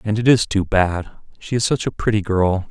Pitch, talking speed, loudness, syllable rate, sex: 105 Hz, 245 wpm, -19 LUFS, 5.0 syllables/s, male